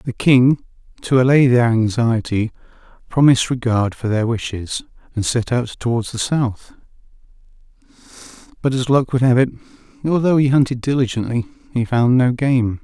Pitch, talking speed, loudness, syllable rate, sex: 120 Hz, 145 wpm, -17 LUFS, 5.0 syllables/s, male